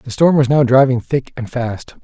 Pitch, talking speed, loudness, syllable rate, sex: 130 Hz, 235 wpm, -15 LUFS, 4.6 syllables/s, male